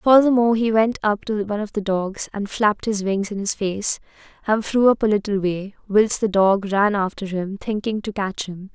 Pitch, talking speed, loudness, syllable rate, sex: 205 Hz, 220 wpm, -21 LUFS, 5.0 syllables/s, female